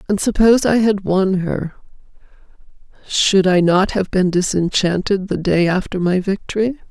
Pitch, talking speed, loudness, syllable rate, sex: 190 Hz, 150 wpm, -16 LUFS, 4.7 syllables/s, female